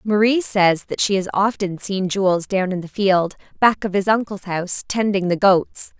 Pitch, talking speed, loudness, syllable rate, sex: 195 Hz, 200 wpm, -19 LUFS, 4.5 syllables/s, female